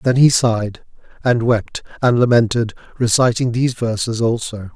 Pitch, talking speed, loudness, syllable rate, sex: 120 Hz, 140 wpm, -17 LUFS, 5.0 syllables/s, male